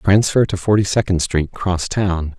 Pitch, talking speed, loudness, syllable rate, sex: 95 Hz, 150 wpm, -18 LUFS, 4.4 syllables/s, male